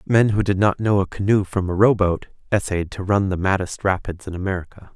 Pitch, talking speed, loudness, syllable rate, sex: 95 Hz, 230 wpm, -21 LUFS, 5.6 syllables/s, male